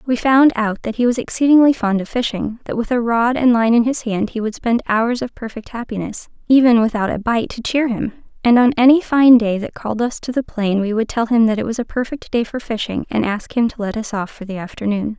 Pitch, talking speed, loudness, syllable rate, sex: 230 Hz, 255 wpm, -17 LUFS, 5.7 syllables/s, female